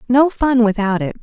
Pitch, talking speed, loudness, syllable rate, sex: 235 Hz, 195 wpm, -16 LUFS, 4.9 syllables/s, female